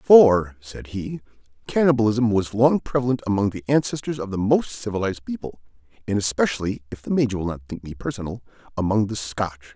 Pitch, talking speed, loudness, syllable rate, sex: 110 Hz, 170 wpm, -22 LUFS, 4.8 syllables/s, male